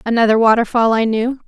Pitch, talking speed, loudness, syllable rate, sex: 230 Hz, 165 wpm, -14 LUFS, 5.8 syllables/s, female